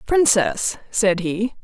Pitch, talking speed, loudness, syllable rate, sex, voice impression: 220 Hz, 110 wpm, -19 LUFS, 3.1 syllables/s, female, very feminine, slightly gender-neutral, slightly young, slightly adult-like, thin, very tensed, powerful, bright, hard, very clear, very fluent, cute, very intellectual, slightly refreshing, sincere, slightly calm, friendly, slightly reassuring, slightly unique, wild, slightly sweet, very lively, strict, intense, slightly sharp